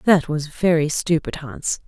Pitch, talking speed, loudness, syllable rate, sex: 160 Hz, 160 wpm, -21 LUFS, 4.1 syllables/s, female